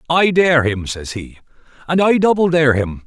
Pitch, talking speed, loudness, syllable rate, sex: 145 Hz, 175 wpm, -15 LUFS, 5.1 syllables/s, male